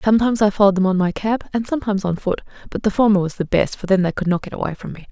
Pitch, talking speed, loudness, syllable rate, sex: 200 Hz, 305 wpm, -19 LUFS, 7.7 syllables/s, female